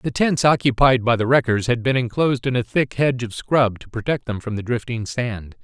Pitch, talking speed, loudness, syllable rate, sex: 120 Hz, 235 wpm, -20 LUFS, 5.4 syllables/s, male